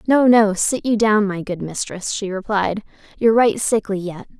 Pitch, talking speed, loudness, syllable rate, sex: 205 Hz, 190 wpm, -18 LUFS, 4.7 syllables/s, female